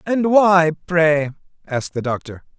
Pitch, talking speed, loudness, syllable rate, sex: 160 Hz, 140 wpm, -17 LUFS, 4.4 syllables/s, male